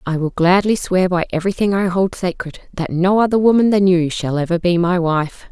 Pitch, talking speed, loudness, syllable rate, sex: 180 Hz, 220 wpm, -16 LUFS, 5.4 syllables/s, female